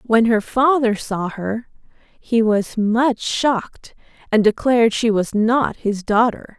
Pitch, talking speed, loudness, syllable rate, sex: 225 Hz, 145 wpm, -18 LUFS, 3.6 syllables/s, female